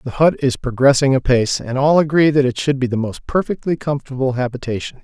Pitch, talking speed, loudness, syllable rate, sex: 135 Hz, 205 wpm, -17 LUFS, 6.1 syllables/s, male